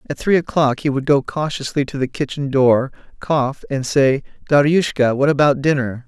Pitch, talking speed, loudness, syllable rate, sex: 140 Hz, 180 wpm, -18 LUFS, 4.9 syllables/s, male